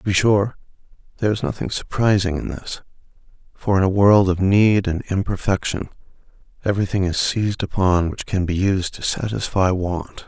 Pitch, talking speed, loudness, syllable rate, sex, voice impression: 95 Hz, 165 wpm, -20 LUFS, 5.2 syllables/s, male, masculine, adult-like, slightly dark, cool, intellectual, calm